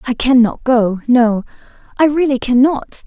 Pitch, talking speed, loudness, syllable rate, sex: 250 Hz, 135 wpm, -14 LUFS, 4.4 syllables/s, female